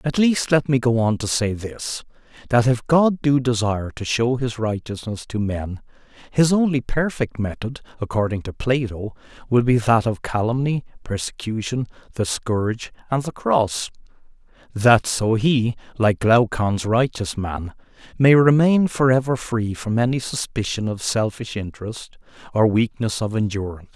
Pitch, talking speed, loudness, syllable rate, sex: 115 Hz, 150 wpm, -21 LUFS, 4.6 syllables/s, male